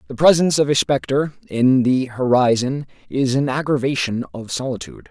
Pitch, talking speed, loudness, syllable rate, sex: 130 Hz, 155 wpm, -19 LUFS, 5.4 syllables/s, male